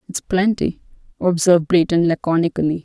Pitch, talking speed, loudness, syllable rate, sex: 175 Hz, 105 wpm, -18 LUFS, 5.7 syllables/s, female